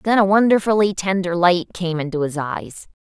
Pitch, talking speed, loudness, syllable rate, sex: 185 Hz, 180 wpm, -18 LUFS, 5.0 syllables/s, female